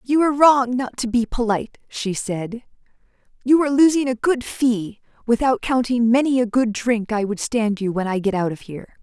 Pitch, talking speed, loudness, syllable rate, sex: 235 Hz, 205 wpm, -20 LUFS, 5.2 syllables/s, female